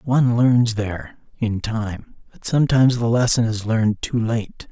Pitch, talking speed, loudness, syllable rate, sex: 115 Hz, 140 wpm, -20 LUFS, 4.7 syllables/s, male